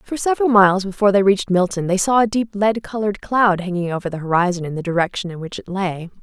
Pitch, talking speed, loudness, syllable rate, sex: 195 Hz, 240 wpm, -18 LUFS, 6.6 syllables/s, female